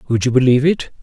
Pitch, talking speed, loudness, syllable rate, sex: 135 Hz, 235 wpm, -15 LUFS, 7.6 syllables/s, male